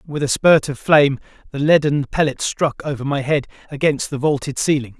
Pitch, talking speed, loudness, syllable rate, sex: 140 Hz, 190 wpm, -18 LUFS, 5.4 syllables/s, male